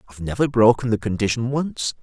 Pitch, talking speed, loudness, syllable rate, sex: 120 Hz, 205 wpm, -20 LUFS, 6.0 syllables/s, male